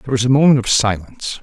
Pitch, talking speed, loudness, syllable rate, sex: 120 Hz, 250 wpm, -15 LUFS, 7.2 syllables/s, male